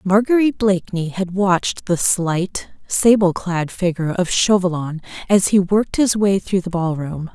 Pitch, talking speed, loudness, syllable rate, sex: 185 Hz, 165 wpm, -18 LUFS, 4.7 syllables/s, female